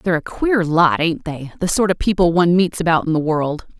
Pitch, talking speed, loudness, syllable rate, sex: 170 Hz, 220 wpm, -17 LUFS, 5.7 syllables/s, female